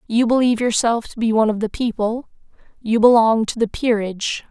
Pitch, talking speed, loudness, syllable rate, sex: 225 Hz, 185 wpm, -18 LUFS, 5.8 syllables/s, female